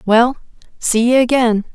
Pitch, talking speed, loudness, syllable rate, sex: 235 Hz, 140 wpm, -15 LUFS, 4.4 syllables/s, female